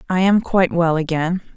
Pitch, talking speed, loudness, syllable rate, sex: 175 Hz, 190 wpm, -18 LUFS, 5.2 syllables/s, female